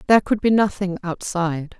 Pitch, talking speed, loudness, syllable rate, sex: 185 Hz, 165 wpm, -20 LUFS, 5.7 syllables/s, female